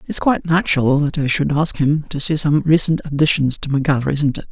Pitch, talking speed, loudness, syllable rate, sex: 150 Hz, 225 wpm, -17 LUFS, 6.0 syllables/s, male